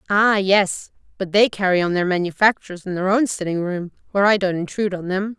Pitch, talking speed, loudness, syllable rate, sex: 190 Hz, 210 wpm, -19 LUFS, 5.9 syllables/s, female